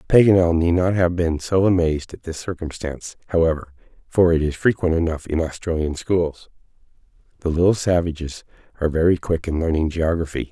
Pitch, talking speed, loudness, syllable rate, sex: 85 Hz, 160 wpm, -20 LUFS, 5.7 syllables/s, male